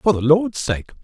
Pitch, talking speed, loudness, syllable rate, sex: 160 Hz, 235 wpm, -18 LUFS, 4.4 syllables/s, male